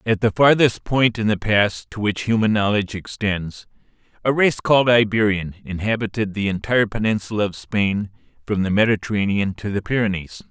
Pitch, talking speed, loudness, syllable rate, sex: 105 Hz, 160 wpm, -20 LUFS, 5.4 syllables/s, male